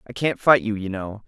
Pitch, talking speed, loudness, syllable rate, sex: 110 Hz, 285 wpm, -21 LUFS, 5.6 syllables/s, male